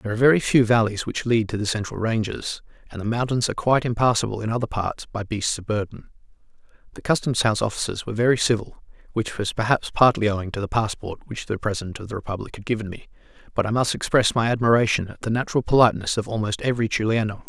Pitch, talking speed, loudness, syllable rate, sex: 110 Hz, 215 wpm, -23 LUFS, 6.9 syllables/s, male